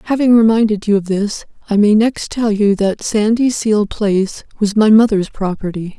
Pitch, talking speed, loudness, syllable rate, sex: 210 Hz, 170 wpm, -14 LUFS, 4.7 syllables/s, female